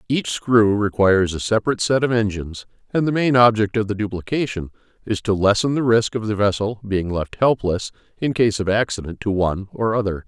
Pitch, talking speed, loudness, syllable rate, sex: 105 Hz, 200 wpm, -20 LUFS, 5.7 syllables/s, male